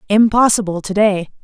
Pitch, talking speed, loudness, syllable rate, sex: 205 Hz, 125 wpm, -14 LUFS, 5.3 syllables/s, female